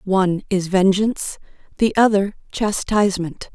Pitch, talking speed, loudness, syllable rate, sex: 195 Hz, 100 wpm, -19 LUFS, 4.6 syllables/s, female